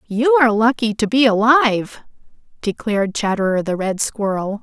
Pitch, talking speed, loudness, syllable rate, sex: 220 Hz, 145 wpm, -17 LUFS, 5.1 syllables/s, female